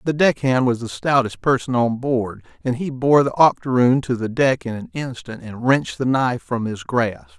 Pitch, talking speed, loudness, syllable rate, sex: 125 Hz, 210 wpm, -20 LUFS, 5.0 syllables/s, male